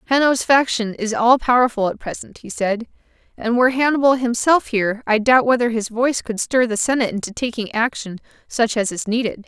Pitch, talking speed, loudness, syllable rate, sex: 235 Hz, 190 wpm, -18 LUFS, 5.7 syllables/s, female